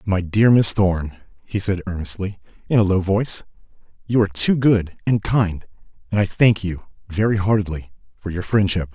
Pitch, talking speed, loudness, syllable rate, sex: 100 Hz, 175 wpm, -19 LUFS, 5.2 syllables/s, male